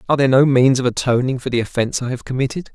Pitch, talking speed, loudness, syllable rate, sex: 130 Hz, 260 wpm, -17 LUFS, 7.9 syllables/s, male